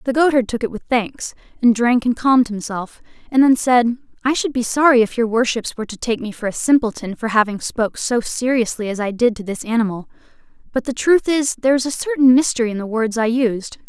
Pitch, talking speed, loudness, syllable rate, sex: 240 Hz, 230 wpm, -18 LUFS, 5.8 syllables/s, female